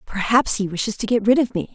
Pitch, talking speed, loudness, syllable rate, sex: 220 Hz, 275 wpm, -19 LUFS, 6.2 syllables/s, female